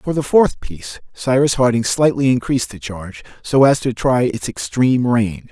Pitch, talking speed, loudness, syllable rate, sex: 120 Hz, 185 wpm, -16 LUFS, 5.2 syllables/s, male